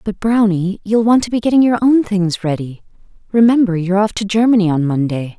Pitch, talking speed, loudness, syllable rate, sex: 200 Hz, 200 wpm, -15 LUFS, 5.7 syllables/s, female